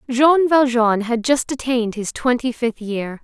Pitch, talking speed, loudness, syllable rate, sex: 245 Hz, 165 wpm, -18 LUFS, 4.3 syllables/s, female